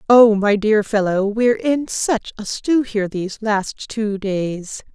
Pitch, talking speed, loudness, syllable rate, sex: 215 Hz, 170 wpm, -18 LUFS, 3.9 syllables/s, female